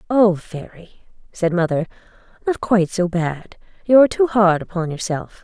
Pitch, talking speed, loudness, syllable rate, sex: 190 Hz, 155 wpm, -18 LUFS, 4.8 syllables/s, female